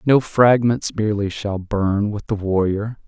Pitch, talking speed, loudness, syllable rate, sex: 105 Hz, 155 wpm, -19 LUFS, 4.1 syllables/s, male